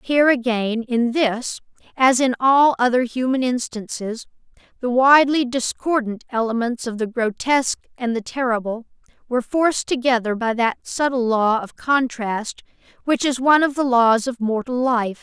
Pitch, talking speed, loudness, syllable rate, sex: 245 Hz, 150 wpm, -20 LUFS, 4.8 syllables/s, female